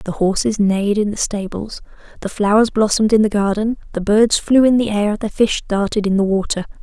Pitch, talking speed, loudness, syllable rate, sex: 210 Hz, 210 wpm, -17 LUFS, 5.5 syllables/s, female